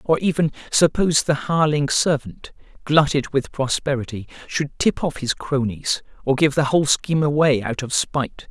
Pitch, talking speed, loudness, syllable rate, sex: 145 Hz, 160 wpm, -20 LUFS, 5.0 syllables/s, male